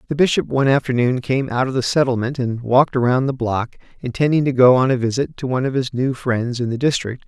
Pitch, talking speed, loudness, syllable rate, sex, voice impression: 130 Hz, 240 wpm, -18 LUFS, 6.1 syllables/s, male, masculine, adult-like, slightly refreshing, friendly, slightly kind